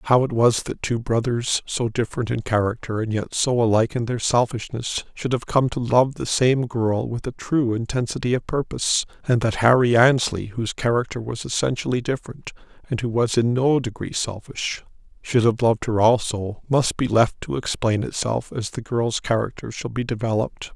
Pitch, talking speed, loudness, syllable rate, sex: 120 Hz, 190 wpm, -22 LUFS, 5.3 syllables/s, male